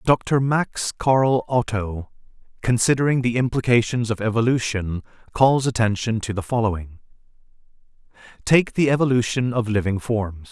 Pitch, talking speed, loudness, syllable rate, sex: 115 Hz, 115 wpm, -21 LUFS, 4.7 syllables/s, male